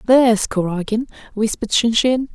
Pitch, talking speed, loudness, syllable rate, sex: 225 Hz, 100 wpm, -18 LUFS, 5.4 syllables/s, female